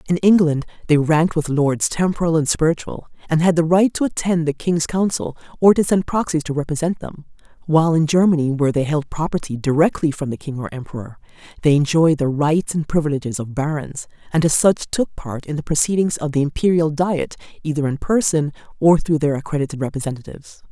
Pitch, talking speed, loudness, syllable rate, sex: 155 Hz, 190 wpm, -19 LUFS, 5.8 syllables/s, female